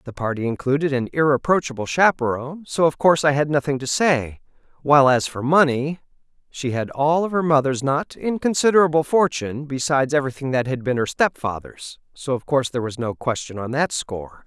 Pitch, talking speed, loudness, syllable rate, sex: 140 Hz, 180 wpm, -20 LUFS, 5.7 syllables/s, male